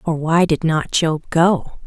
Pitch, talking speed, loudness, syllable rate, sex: 165 Hz, 195 wpm, -17 LUFS, 3.6 syllables/s, female